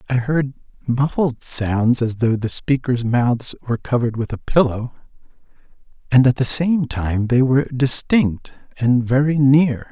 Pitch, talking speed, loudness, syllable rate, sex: 125 Hz, 150 wpm, -18 LUFS, 4.4 syllables/s, male